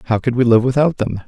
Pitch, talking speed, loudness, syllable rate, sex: 125 Hz, 280 wpm, -16 LUFS, 6.7 syllables/s, male